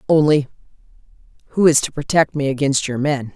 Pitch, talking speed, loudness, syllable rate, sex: 145 Hz, 160 wpm, -18 LUFS, 5.7 syllables/s, female